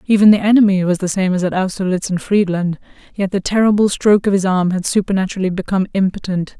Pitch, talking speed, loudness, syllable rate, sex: 190 Hz, 190 wpm, -16 LUFS, 6.6 syllables/s, female